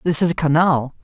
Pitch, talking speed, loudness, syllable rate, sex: 155 Hz, 230 wpm, -17 LUFS, 5.7 syllables/s, male